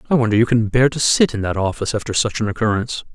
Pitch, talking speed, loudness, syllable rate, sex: 110 Hz, 265 wpm, -18 LUFS, 7.3 syllables/s, male